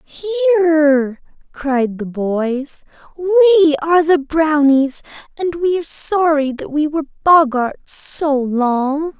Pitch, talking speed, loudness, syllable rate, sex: 305 Hz, 120 wpm, -16 LUFS, 3.5 syllables/s, female